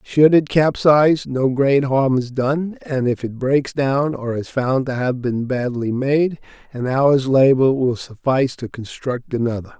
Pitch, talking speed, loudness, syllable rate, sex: 130 Hz, 180 wpm, -18 LUFS, 4.1 syllables/s, male